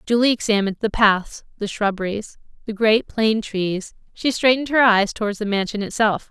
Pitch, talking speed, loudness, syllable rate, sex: 215 Hz, 170 wpm, -20 LUFS, 5.2 syllables/s, female